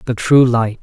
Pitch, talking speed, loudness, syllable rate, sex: 120 Hz, 215 wpm, -13 LUFS, 4.5 syllables/s, male